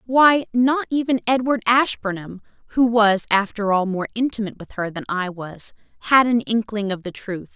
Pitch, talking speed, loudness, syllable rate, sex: 220 Hz, 175 wpm, -20 LUFS, 4.9 syllables/s, female